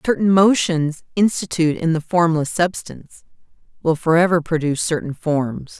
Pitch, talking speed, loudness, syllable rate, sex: 165 Hz, 125 wpm, -18 LUFS, 5.0 syllables/s, female